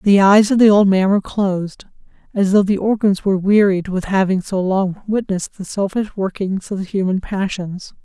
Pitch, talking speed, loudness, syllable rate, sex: 195 Hz, 195 wpm, -17 LUFS, 5.1 syllables/s, female